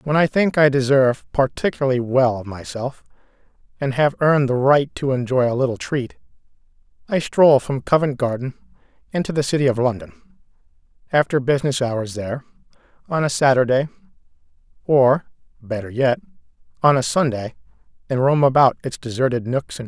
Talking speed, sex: 150 wpm, male